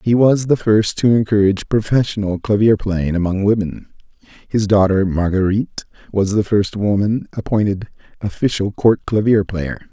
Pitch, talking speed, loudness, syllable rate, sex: 105 Hz, 140 wpm, -17 LUFS, 5.0 syllables/s, male